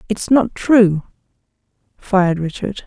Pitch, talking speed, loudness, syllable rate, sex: 200 Hz, 105 wpm, -16 LUFS, 3.9 syllables/s, female